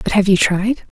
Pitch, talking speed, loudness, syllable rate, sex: 200 Hz, 265 wpm, -15 LUFS, 4.7 syllables/s, female